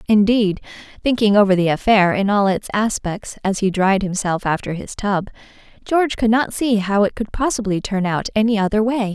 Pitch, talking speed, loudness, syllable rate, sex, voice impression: 205 Hz, 190 wpm, -18 LUFS, 5.2 syllables/s, female, feminine, adult-like, tensed, powerful, bright, soft, clear, fluent, calm, friendly, reassuring, elegant, lively, kind